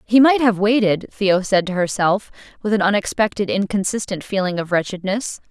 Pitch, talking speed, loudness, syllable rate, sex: 200 Hz, 165 wpm, -19 LUFS, 5.2 syllables/s, female